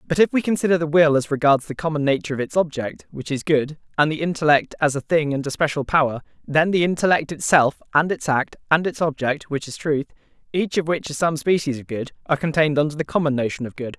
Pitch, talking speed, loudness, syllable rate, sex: 150 Hz, 240 wpm, -21 LUFS, 6.2 syllables/s, male